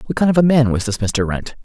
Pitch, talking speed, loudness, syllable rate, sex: 125 Hz, 330 wpm, -16 LUFS, 6.2 syllables/s, male